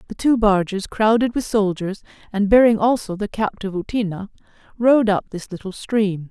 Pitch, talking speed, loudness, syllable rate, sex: 210 Hz, 160 wpm, -19 LUFS, 5.3 syllables/s, female